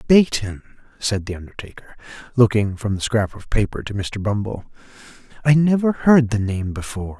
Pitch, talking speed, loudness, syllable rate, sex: 110 Hz, 160 wpm, -20 LUFS, 5.2 syllables/s, male